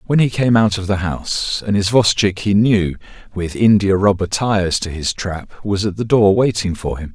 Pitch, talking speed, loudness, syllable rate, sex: 100 Hz, 210 wpm, -17 LUFS, 5.0 syllables/s, male